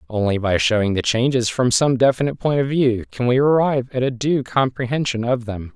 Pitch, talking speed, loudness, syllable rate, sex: 125 Hz, 210 wpm, -19 LUFS, 5.6 syllables/s, male